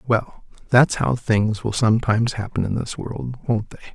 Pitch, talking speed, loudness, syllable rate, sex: 115 Hz, 180 wpm, -21 LUFS, 4.9 syllables/s, male